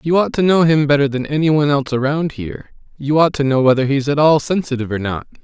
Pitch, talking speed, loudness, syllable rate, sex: 145 Hz, 255 wpm, -16 LUFS, 6.6 syllables/s, male